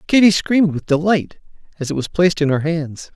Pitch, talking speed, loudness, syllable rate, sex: 165 Hz, 210 wpm, -17 LUFS, 5.7 syllables/s, male